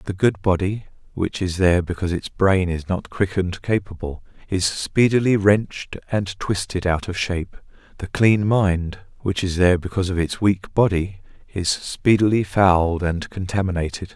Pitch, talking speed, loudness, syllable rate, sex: 95 Hz, 160 wpm, -21 LUFS, 3.0 syllables/s, male